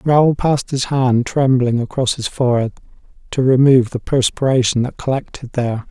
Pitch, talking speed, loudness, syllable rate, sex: 130 Hz, 150 wpm, -16 LUFS, 5.3 syllables/s, male